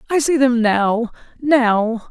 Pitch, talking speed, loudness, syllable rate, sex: 245 Hz, 115 wpm, -16 LUFS, 3.3 syllables/s, female